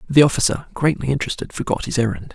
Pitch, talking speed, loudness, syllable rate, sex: 130 Hz, 180 wpm, -20 LUFS, 7.1 syllables/s, male